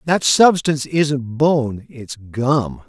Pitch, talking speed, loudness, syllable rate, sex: 135 Hz, 125 wpm, -17 LUFS, 3.0 syllables/s, male